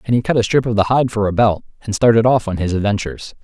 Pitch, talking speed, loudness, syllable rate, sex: 110 Hz, 295 wpm, -16 LUFS, 6.8 syllables/s, male